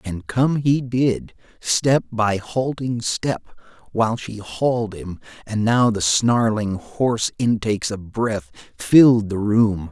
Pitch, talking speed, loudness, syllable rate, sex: 110 Hz, 140 wpm, -20 LUFS, 3.7 syllables/s, male